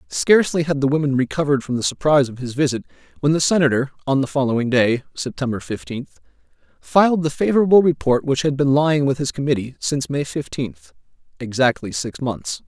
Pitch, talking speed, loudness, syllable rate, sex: 140 Hz, 175 wpm, -19 LUFS, 6.0 syllables/s, male